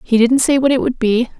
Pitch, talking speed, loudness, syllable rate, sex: 250 Hz, 300 wpm, -14 LUFS, 5.7 syllables/s, female